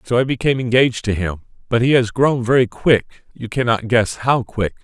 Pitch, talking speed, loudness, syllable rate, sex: 120 Hz, 200 wpm, -17 LUFS, 5.5 syllables/s, male